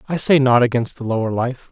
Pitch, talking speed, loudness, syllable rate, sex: 125 Hz, 245 wpm, -17 LUFS, 5.9 syllables/s, male